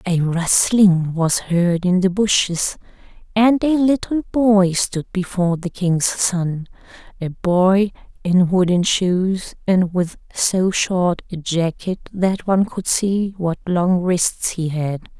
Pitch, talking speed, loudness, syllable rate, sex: 185 Hz, 140 wpm, -18 LUFS, 3.4 syllables/s, female